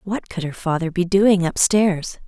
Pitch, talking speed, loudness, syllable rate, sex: 185 Hz, 210 wpm, -19 LUFS, 4.3 syllables/s, female